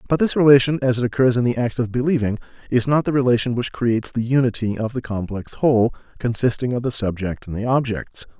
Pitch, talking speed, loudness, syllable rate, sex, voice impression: 120 Hz, 215 wpm, -20 LUFS, 6.1 syllables/s, male, very masculine, very middle-aged, very thick, very tensed, powerful, bright, soft, muffled, fluent, very cool, very intellectual, refreshing, sincere, calm, very mature, very friendly, reassuring, very unique, elegant, wild, sweet, lively, kind, slightly intense